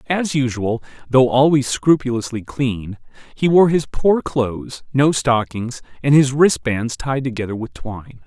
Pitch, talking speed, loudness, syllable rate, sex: 130 Hz, 145 wpm, -18 LUFS, 4.3 syllables/s, male